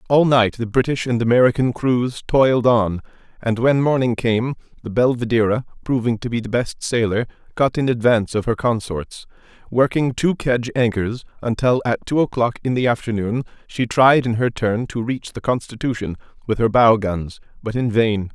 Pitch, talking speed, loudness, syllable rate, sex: 120 Hz, 175 wpm, -19 LUFS, 5.0 syllables/s, male